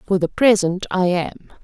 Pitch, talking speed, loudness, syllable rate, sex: 190 Hz, 185 wpm, -18 LUFS, 4.4 syllables/s, female